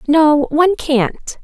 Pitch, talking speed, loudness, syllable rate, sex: 300 Hz, 125 wpm, -14 LUFS, 3.3 syllables/s, female